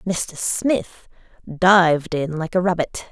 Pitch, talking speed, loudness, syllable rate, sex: 175 Hz, 135 wpm, -19 LUFS, 3.4 syllables/s, female